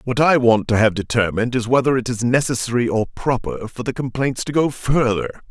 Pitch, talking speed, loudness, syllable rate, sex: 120 Hz, 205 wpm, -19 LUFS, 5.6 syllables/s, male